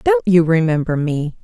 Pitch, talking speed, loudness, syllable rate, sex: 185 Hz, 165 wpm, -16 LUFS, 4.6 syllables/s, female